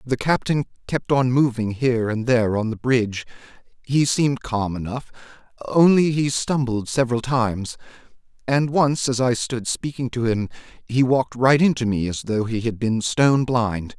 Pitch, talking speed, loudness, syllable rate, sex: 125 Hz, 170 wpm, -21 LUFS, 4.9 syllables/s, male